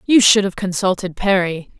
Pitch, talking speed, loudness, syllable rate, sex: 190 Hz, 165 wpm, -16 LUFS, 5.1 syllables/s, female